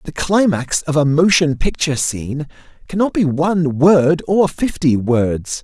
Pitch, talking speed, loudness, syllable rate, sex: 155 Hz, 150 wpm, -16 LUFS, 4.3 syllables/s, male